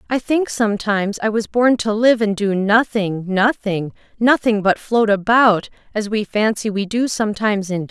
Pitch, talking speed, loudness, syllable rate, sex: 215 Hz, 180 wpm, -18 LUFS, 4.9 syllables/s, female